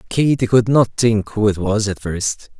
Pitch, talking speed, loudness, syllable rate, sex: 110 Hz, 210 wpm, -17 LUFS, 4.4 syllables/s, male